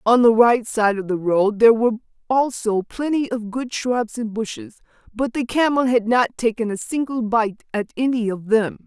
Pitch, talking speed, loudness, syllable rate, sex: 230 Hz, 195 wpm, -20 LUFS, 4.9 syllables/s, female